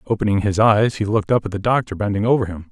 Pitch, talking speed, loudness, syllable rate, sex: 105 Hz, 265 wpm, -18 LUFS, 7.0 syllables/s, male